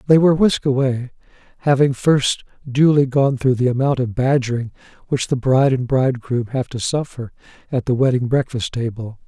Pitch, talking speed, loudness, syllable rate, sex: 130 Hz, 170 wpm, -18 LUFS, 5.4 syllables/s, male